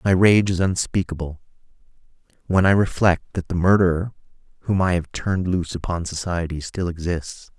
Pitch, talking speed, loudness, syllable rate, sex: 90 Hz, 150 wpm, -21 LUFS, 5.3 syllables/s, male